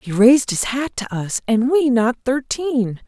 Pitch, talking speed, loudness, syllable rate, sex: 245 Hz, 195 wpm, -18 LUFS, 4.2 syllables/s, female